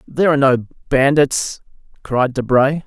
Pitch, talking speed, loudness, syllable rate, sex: 135 Hz, 125 wpm, -16 LUFS, 4.7 syllables/s, male